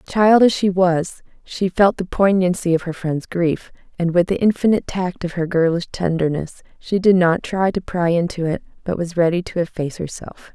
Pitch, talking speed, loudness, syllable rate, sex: 175 Hz, 200 wpm, -19 LUFS, 5.0 syllables/s, female